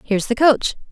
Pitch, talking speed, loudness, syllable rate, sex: 235 Hz, 195 wpm, -17 LUFS, 8.0 syllables/s, female